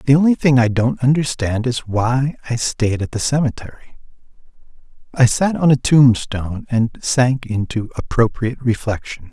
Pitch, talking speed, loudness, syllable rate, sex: 125 Hz, 150 wpm, -17 LUFS, 4.7 syllables/s, male